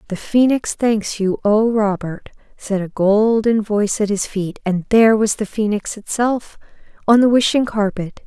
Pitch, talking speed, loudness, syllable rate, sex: 215 Hz, 165 wpm, -17 LUFS, 4.5 syllables/s, female